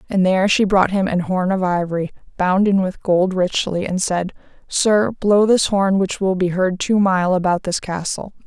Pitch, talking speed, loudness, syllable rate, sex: 190 Hz, 200 wpm, -18 LUFS, 4.6 syllables/s, female